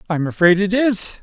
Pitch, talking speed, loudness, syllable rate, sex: 195 Hz, 195 wpm, -16 LUFS, 5.3 syllables/s, male